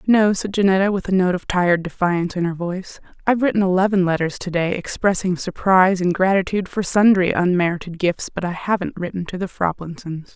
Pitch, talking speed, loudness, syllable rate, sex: 185 Hz, 190 wpm, -19 LUFS, 5.9 syllables/s, female